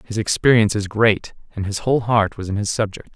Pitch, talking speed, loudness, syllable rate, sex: 105 Hz, 230 wpm, -19 LUFS, 6.0 syllables/s, male